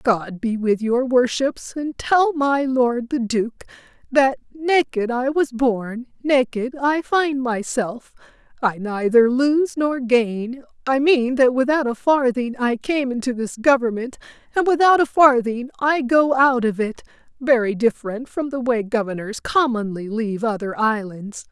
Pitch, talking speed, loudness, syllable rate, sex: 250 Hz, 155 wpm, -20 LUFS, 4.0 syllables/s, female